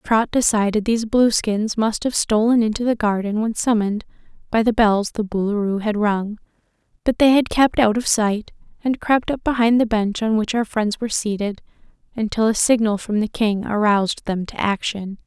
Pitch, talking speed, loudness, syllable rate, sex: 220 Hz, 190 wpm, -19 LUFS, 5.1 syllables/s, female